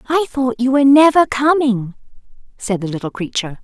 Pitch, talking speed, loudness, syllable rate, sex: 250 Hz, 165 wpm, -15 LUFS, 5.8 syllables/s, female